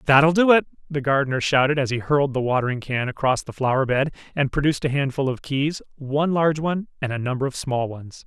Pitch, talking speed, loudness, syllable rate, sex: 140 Hz, 220 wpm, -22 LUFS, 6.3 syllables/s, male